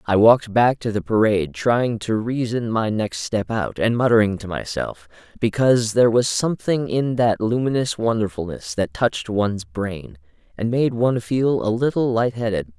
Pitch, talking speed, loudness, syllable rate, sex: 110 Hz, 175 wpm, -20 LUFS, 5.0 syllables/s, male